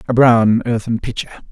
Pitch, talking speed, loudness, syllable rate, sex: 115 Hz, 160 wpm, -15 LUFS, 5.5 syllables/s, male